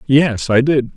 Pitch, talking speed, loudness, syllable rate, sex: 135 Hz, 190 wpm, -15 LUFS, 3.6 syllables/s, male